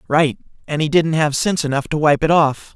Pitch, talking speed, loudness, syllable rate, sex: 155 Hz, 240 wpm, -17 LUFS, 5.7 syllables/s, male